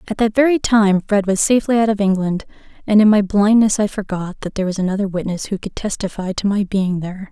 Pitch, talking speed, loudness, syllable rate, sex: 200 Hz, 230 wpm, -17 LUFS, 6.1 syllables/s, female